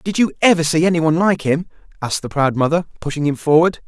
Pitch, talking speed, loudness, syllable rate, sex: 160 Hz, 215 wpm, -17 LUFS, 6.4 syllables/s, male